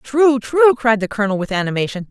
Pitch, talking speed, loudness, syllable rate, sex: 225 Hz, 170 wpm, -16 LUFS, 5.8 syllables/s, female